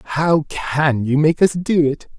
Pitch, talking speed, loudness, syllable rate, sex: 150 Hz, 190 wpm, -17 LUFS, 4.0 syllables/s, male